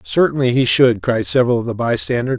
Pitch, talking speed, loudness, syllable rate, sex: 125 Hz, 200 wpm, -16 LUFS, 6.1 syllables/s, male